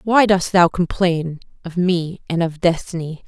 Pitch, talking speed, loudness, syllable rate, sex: 175 Hz, 165 wpm, -18 LUFS, 4.2 syllables/s, female